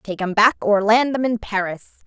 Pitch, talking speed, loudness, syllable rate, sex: 215 Hz, 230 wpm, -18 LUFS, 4.8 syllables/s, female